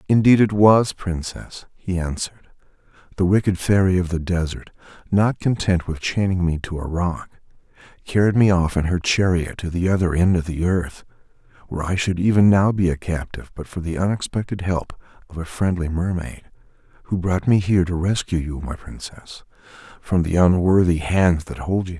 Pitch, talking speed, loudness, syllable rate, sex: 90 Hz, 180 wpm, -20 LUFS, 5.1 syllables/s, male